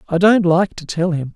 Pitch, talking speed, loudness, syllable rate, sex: 175 Hz, 265 wpm, -16 LUFS, 5.0 syllables/s, male